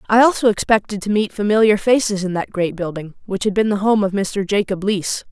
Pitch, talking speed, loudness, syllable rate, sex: 205 Hz, 225 wpm, -18 LUFS, 5.8 syllables/s, female